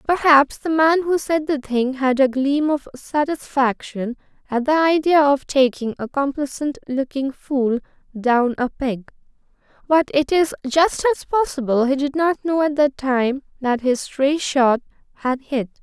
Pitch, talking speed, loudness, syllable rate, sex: 280 Hz, 165 wpm, -19 LUFS, 4.1 syllables/s, female